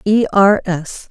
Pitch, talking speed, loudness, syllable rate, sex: 195 Hz, 165 wpm, -14 LUFS, 3.5 syllables/s, female